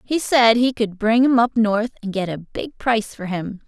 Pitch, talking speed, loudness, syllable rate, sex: 225 Hz, 245 wpm, -19 LUFS, 4.7 syllables/s, female